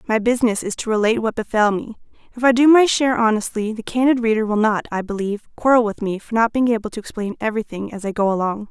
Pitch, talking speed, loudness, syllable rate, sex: 220 Hz, 240 wpm, -19 LUFS, 6.8 syllables/s, female